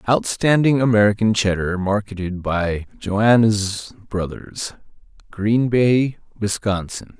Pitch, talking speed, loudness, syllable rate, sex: 105 Hz, 85 wpm, -19 LUFS, 3.7 syllables/s, male